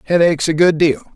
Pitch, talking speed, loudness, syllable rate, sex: 160 Hz, 260 wpm, -14 LUFS, 6.5 syllables/s, male